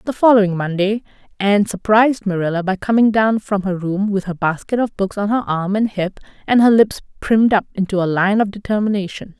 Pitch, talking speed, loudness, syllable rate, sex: 200 Hz, 205 wpm, -17 LUFS, 5.8 syllables/s, female